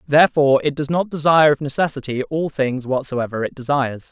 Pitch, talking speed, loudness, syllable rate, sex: 140 Hz, 175 wpm, -19 LUFS, 6.1 syllables/s, male